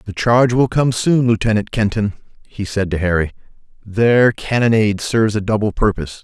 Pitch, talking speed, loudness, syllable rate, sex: 105 Hz, 165 wpm, -16 LUFS, 5.6 syllables/s, male